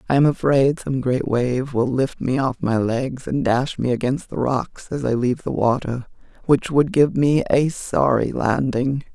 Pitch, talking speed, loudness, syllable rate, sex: 130 Hz, 190 wpm, -20 LUFS, 4.3 syllables/s, female